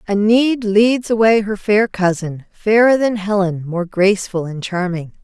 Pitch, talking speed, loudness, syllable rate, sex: 200 Hz, 150 wpm, -16 LUFS, 4.6 syllables/s, female